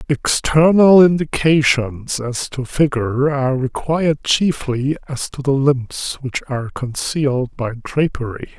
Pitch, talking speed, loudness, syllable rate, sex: 140 Hz, 120 wpm, -17 LUFS, 4.1 syllables/s, male